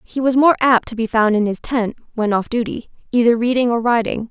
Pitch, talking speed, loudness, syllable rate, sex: 235 Hz, 235 wpm, -17 LUFS, 5.7 syllables/s, female